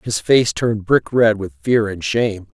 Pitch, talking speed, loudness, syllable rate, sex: 110 Hz, 210 wpm, -17 LUFS, 4.7 syllables/s, male